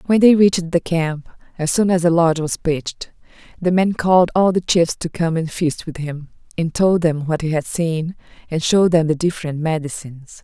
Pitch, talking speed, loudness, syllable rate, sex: 165 Hz, 215 wpm, -18 LUFS, 5.2 syllables/s, female